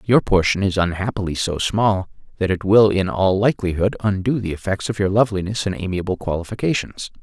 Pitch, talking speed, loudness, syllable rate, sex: 100 Hz, 175 wpm, -20 LUFS, 5.8 syllables/s, male